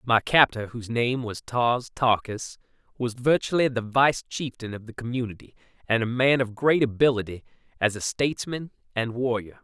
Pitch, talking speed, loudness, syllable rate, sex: 120 Hz, 160 wpm, -25 LUFS, 5.0 syllables/s, male